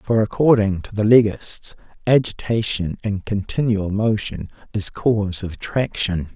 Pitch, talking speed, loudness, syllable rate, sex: 105 Hz, 125 wpm, -20 LUFS, 4.5 syllables/s, male